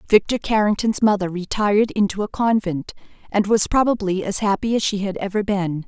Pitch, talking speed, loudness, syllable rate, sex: 200 Hz, 175 wpm, -20 LUFS, 5.5 syllables/s, female